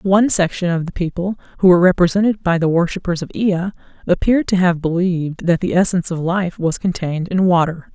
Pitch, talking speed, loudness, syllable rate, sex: 180 Hz, 195 wpm, -17 LUFS, 6.0 syllables/s, female